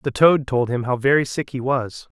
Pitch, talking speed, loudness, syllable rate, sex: 130 Hz, 245 wpm, -20 LUFS, 4.9 syllables/s, male